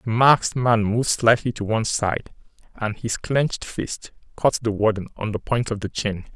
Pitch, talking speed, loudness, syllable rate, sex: 115 Hz, 200 wpm, -22 LUFS, 4.9 syllables/s, male